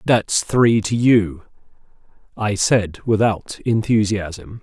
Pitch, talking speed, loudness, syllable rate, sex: 105 Hz, 105 wpm, -18 LUFS, 3.0 syllables/s, male